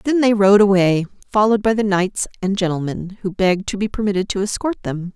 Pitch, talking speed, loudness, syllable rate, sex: 200 Hz, 210 wpm, -18 LUFS, 6.0 syllables/s, female